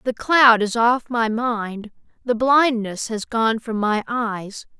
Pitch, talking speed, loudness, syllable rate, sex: 230 Hz, 165 wpm, -19 LUFS, 3.3 syllables/s, female